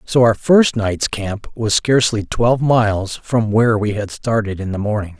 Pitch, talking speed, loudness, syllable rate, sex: 110 Hz, 195 wpm, -17 LUFS, 4.7 syllables/s, male